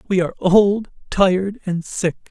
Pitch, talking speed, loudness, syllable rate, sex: 190 Hz, 155 wpm, -18 LUFS, 4.6 syllables/s, male